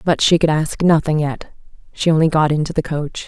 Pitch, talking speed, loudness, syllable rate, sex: 155 Hz, 220 wpm, -17 LUFS, 5.4 syllables/s, female